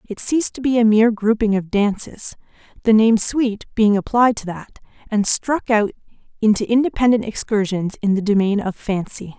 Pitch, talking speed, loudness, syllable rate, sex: 215 Hz, 175 wpm, -18 LUFS, 5.3 syllables/s, female